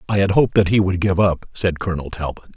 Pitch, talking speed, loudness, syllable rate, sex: 95 Hz, 260 wpm, -19 LUFS, 6.7 syllables/s, male